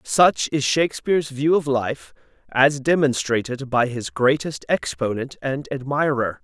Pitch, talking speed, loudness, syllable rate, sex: 135 Hz, 130 wpm, -21 LUFS, 4.3 syllables/s, male